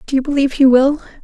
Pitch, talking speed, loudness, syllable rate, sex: 270 Hz, 245 wpm, -14 LUFS, 7.6 syllables/s, female